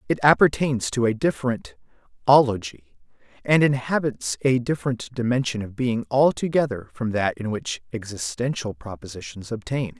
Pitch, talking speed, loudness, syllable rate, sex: 120 Hz, 125 wpm, -23 LUFS, 5.1 syllables/s, male